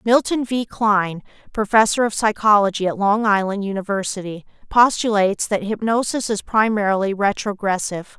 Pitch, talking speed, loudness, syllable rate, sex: 210 Hz, 115 wpm, -19 LUFS, 5.3 syllables/s, female